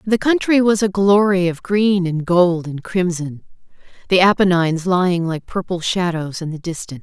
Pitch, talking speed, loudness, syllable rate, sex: 180 Hz, 170 wpm, -17 LUFS, 5.0 syllables/s, female